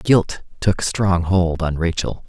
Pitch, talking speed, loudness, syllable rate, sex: 90 Hz, 160 wpm, -19 LUFS, 3.5 syllables/s, male